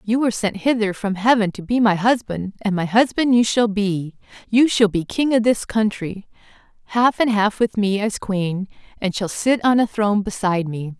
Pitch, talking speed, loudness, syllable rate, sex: 210 Hz, 205 wpm, -19 LUFS, 4.9 syllables/s, female